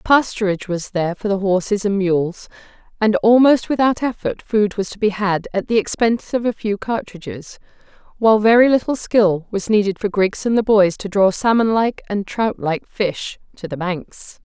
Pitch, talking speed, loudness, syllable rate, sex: 205 Hz, 190 wpm, -18 LUFS, 4.9 syllables/s, female